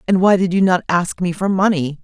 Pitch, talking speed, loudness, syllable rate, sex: 180 Hz, 265 wpm, -16 LUFS, 5.5 syllables/s, female